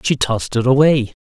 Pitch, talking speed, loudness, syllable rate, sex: 130 Hz, 195 wpm, -15 LUFS, 5.7 syllables/s, male